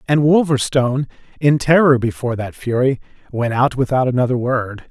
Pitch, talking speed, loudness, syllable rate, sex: 130 Hz, 145 wpm, -17 LUFS, 5.4 syllables/s, male